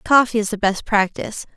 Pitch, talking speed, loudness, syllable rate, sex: 215 Hz, 190 wpm, -19 LUFS, 5.8 syllables/s, female